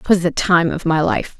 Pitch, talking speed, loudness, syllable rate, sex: 170 Hz, 260 wpm, -17 LUFS, 4.7 syllables/s, female